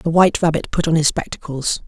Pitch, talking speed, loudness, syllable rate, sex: 160 Hz, 225 wpm, -18 LUFS, 6.2 syllables/s, male